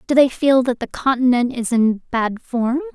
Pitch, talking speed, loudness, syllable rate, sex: 250 Hz, 205 wpm, -18 LUFS, 4.4 syllables/s, female